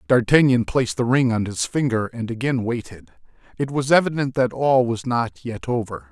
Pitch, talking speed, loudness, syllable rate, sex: 120 Hz, 185 wpm, -21 LUFS, 5.0 syllables/s, male